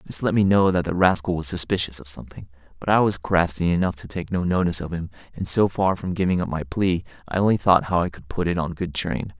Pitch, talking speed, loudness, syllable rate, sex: 85 Hz, 260 wpm, -22 LUFS, 6.2 syllables/s, male